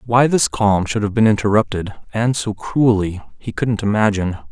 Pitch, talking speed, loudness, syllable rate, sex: 105 Hz, 175 wpm, -17 LUFS, 4.9 syllables/s, male